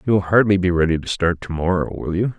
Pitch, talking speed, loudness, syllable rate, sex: 95 Hz, 275 wpm, -19 LUFS, 6.4 syllables/s, male